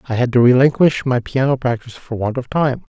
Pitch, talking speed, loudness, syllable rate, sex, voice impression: 125 Hz, 225 wpm, -16 LUFS, 5.9 syllables/s, male, very masculine, very adult-like, very middle-aged, very thick, tensed, powerful, slightly dark, soft, slightly muffled, fluent, slightly raspy, cool, intellectual, slightly refreshing, very sincere, very calm, very mature, friendly, very reassuring, very unique, slightly elegant, wild, sweet, slightly lively, kind, slightly modest